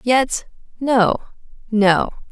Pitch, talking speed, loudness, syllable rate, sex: 225 Hz, 80 wpm, -18 LUFS, 2.6 syllables/s, female